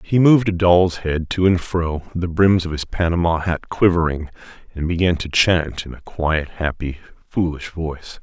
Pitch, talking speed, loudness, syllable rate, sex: 85 Hz, 180 wpm, -19 LUFS, 4.8 syllables/s, male